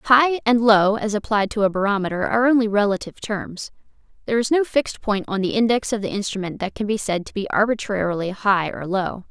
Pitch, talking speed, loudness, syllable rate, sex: 210 Hz, 215 wpm, -21 LUFS, 5.9 syllables/s, female